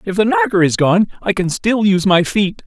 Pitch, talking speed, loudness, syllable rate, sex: 190 Hz, 250 wpm, -15 LUFS, 5.4 syllables/s, male